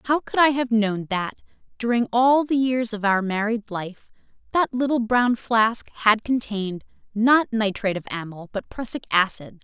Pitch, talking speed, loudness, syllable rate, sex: 225 Hz, 170 wpm, -22 LUFS, 4.6 syllables/s, female